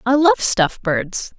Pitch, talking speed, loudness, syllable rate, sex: 230 Hz, 175 wpm, -17 LUFS, 4.1 syllables/s, female